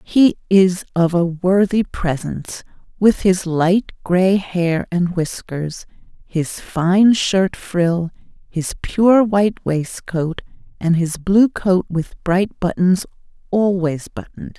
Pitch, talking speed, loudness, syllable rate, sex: 180 Hz, 125 wpm, -18 LUFS, 3.3 syllables/s, female